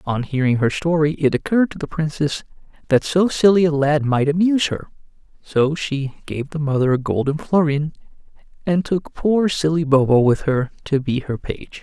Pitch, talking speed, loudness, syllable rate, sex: 150 Hz, 185 wpm, -19 LUFS, 5.0 syllables/s, male